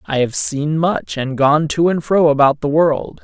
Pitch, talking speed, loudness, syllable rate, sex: 150 Hz, 220 wpm, -16 LUFS, 4.2 syllables/s, male